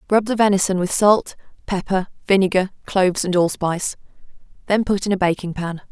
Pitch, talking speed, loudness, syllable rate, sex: 190 Hz, 160 wpm, -19 LUFS, 5.8 syllables/s, female